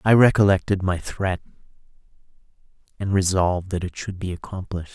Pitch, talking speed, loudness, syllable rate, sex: 95 Hz, 135 wpm, -22 LUFS, 5.8 syllables/s, male